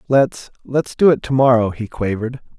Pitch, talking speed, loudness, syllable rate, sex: 125 Hz, 140 wpm, -17 LUFS, 5.1 syllables/s, male